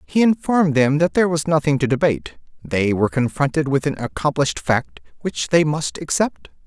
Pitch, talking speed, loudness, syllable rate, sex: 140 Hz, 180 wpm, -19 LUFS, 5.5 syllables/s, male